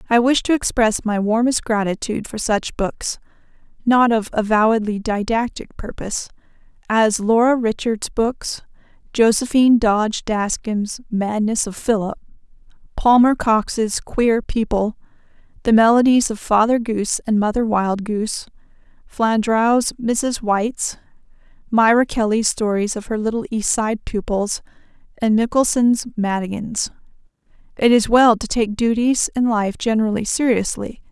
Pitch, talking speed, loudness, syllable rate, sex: 220 Hz, 120 wpm, -18 LUFS, 4.4 syllables/s, female